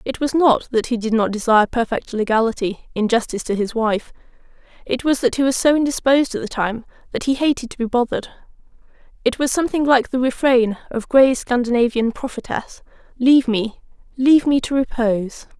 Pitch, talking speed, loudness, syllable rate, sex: 245 Hz, 180 wpm, -18 LUFS, 5.7 syllables/s, female